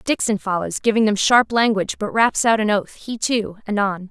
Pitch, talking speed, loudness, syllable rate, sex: 210 Hz, 220 wpm, -19 LUFS, 5.1 syllables/s, female